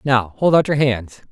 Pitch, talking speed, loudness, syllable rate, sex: 125 Hz, 230 wpm, -17 LUFS, 4.5 syllables/s, male